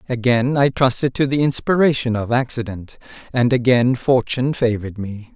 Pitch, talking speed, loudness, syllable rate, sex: 125 Hz, 145 wpm, -18 LUFS, 5.2 syllables/s, male